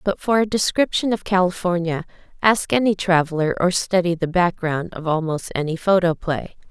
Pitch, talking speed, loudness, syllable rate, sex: 180 Hz, 150 wpm, -20 LUFS, 5.1 syllables/s, female